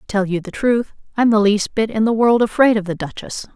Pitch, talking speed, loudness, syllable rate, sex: 215 Hz, 270 wpm, -17 LUFS, 5.7 syllables/s, female